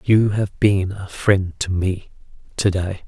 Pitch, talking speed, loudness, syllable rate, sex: 95 Hz, 175 wpm, -20 LUFS, 3.6 syllables/s, male